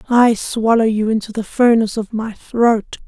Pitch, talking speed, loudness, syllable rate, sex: 225 Hz, 175 wpm, -16 LUFS, 4.6 syllables/s, female